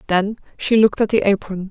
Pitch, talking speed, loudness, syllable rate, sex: 205 Hz, 210 wpm, -18 LUFS, 6.1 syllables/s, female